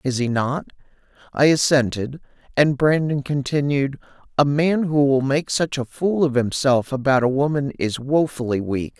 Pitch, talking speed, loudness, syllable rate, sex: 140 Hz, 160 wpm, -20 LUFS, 4.6 syllables/s, male